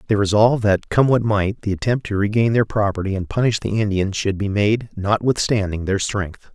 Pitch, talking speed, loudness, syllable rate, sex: 105 Hz, 200 wpm, -19 LUFS, 5.3 syllables/s, male